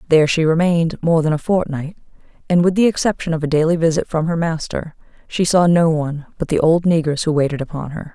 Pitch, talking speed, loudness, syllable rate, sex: 160 Hz, 220 wpm, -17 LUFS, 6.2 syllables/s, female